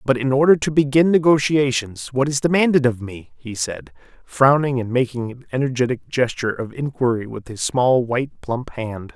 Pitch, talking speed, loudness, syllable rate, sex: 130 Hz, 175 wpm, -19 LUFS, 5.2 syllables/s, male